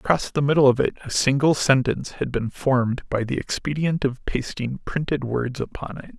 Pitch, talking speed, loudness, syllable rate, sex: 135 Hz, 195 wpm, -23 LUFS, 5.2 syllables/s, male